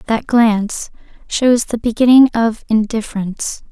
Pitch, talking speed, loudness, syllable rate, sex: 225 Hz, 115 wpm, -15 LUFS, 4.6 syllables/s, female